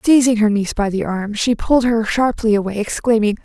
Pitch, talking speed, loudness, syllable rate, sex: 220 Hz, 210 wpm, -17 LUFS, 5.8 syllables/s, female